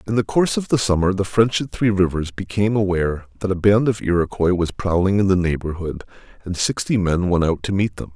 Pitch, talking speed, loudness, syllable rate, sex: 95 Hz, 230 wpm, -20 LUFS, 5.9 syllables/s, male